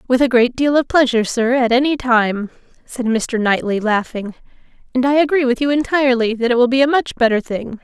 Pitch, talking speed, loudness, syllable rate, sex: 250 Hz, 215 wpm, -16 LUFS, 5.7 syllables/s, female